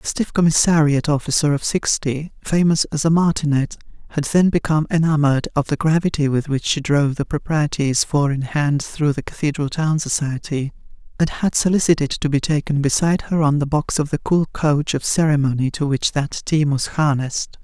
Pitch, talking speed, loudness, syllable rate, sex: 150 Hz, 185 wpm, -19 LUFS, 5.4 syllables/s, female